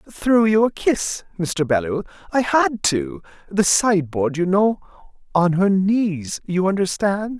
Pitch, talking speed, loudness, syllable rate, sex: 190 Hz, 120 wpm, -19 LUFS, 3.7 syllables/s, male